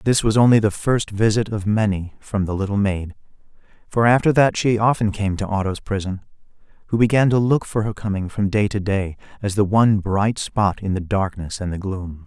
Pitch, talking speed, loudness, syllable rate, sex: 105 Hz, 210 wpm, -20 LUFS, 5.2 syllables/s, male